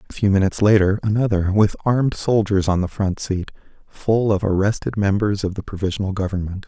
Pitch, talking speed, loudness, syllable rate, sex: 100 Hz, 180 wpm, -20 LUFS, 5.9 syllables/s, male